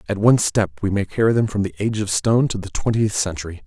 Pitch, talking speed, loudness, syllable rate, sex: 105 Hz, 260 wpm, -20 LUFS, 6.7 syllables/s, male